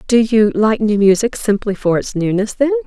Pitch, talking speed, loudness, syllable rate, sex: 220 Hz, 210 wpm, -15 LUFS, 5.1 syllables/s, female